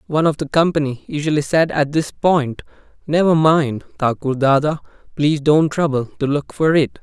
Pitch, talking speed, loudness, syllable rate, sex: 150 Hz, 170 wpm, -17 LUFS, 5.1 syllables/s, male